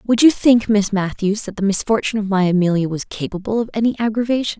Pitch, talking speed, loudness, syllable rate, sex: 210 Hz, 210 wpm, -18 LUFS, 6.2 syllables/s, female